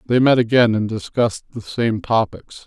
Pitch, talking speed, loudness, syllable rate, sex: 115 Hz, 180 wpm, -18 LUFS, 4.9 syllables/s, male